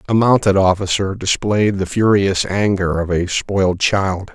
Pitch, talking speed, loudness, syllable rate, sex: 95 Hz, 150 wpm, -16 LUFS, 4.3 syllables/s, male